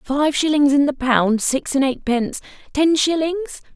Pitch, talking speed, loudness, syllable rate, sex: 285 Hz, 160 wpm, -18 LUFS, 4.3 syllables/s, female